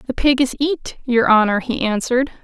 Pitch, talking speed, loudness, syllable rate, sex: 250 Hz, 195 wpm, -17 LUFS, 5.3 syllables/s, female